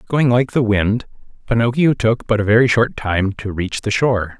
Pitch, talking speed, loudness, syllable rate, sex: 115 Hz, 205 wpm, -17 LUFS, 5.0 syllables/s, male